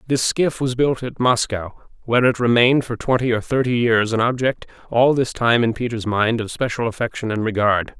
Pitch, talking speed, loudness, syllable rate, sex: 120 Hz, 205 wpm, -19 LUFS, 5.3 syllables/s, male